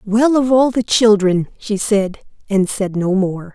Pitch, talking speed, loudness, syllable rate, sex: 210 Hz, 185 wpm, -16 LUFS, 3.9 syllables/s, female